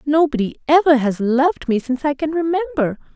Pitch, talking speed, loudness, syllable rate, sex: 290 Hz, 170 wpm, -18 LUFS, 5.8 syllables/s, female